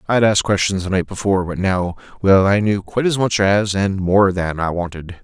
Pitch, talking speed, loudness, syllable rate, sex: 95 Hz, 220 wpm, -17 LUFS, 5.4 syllables/s, male